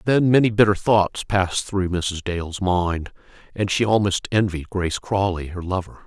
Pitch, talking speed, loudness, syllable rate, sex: 95 Hz, 170 wpm, -21 LUFS, 4.8 syllables/s, male